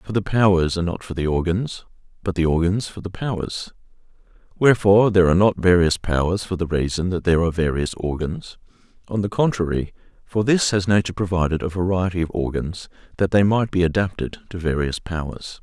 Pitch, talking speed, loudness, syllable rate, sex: 90 Hz, 185 wpm, -21 LUFS, 5.9 syllables/s, male